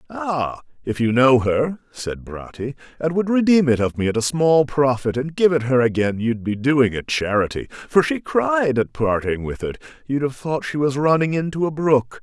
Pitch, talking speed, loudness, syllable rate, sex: 135 Hz, 205 wpm, -20 LUFS, 4.8 syllables/s, male